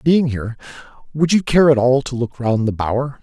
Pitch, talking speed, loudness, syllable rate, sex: 130 Hz, 225 wpm, -17 LUFS, 5.3 syllables/s, male